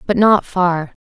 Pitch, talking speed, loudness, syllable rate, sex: 185 Hz, 175 wpm, -15 LUFS, 3.5 syllables/s, female